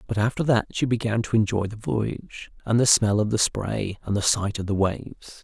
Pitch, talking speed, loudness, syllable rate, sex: 110 Hz, 230 wpm, -23 LUFS, 5.5 syllables/s, male